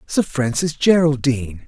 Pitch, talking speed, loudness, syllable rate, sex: 140 Hz, 105 wpm, -18 LUFS, 4.6 syllables/s, male